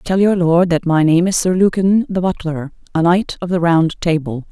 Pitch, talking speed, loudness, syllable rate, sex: 175 Hz, 225 wpm, -15 LUFS, 4.8 syllables/s, female